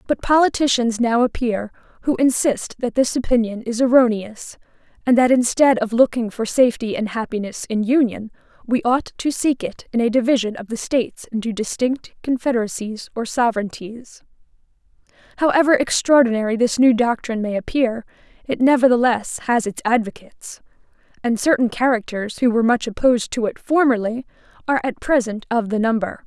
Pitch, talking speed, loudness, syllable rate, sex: 240 Hz, 150 wpm, -19 LUFS, 5.5 syllables/s, female